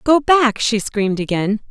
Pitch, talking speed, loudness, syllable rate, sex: 230 Hz, 175 wpm, -16 LUFS, 4.6 syllables/s, female